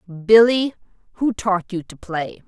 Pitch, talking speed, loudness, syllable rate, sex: 200 Hz, 145 wpm, -18 LUFS, 3.8 syllables/s, female